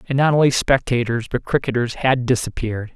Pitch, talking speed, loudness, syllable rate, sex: 125 Hz, 160 wpm, -19 LUFS, 5.8 syllables/s, male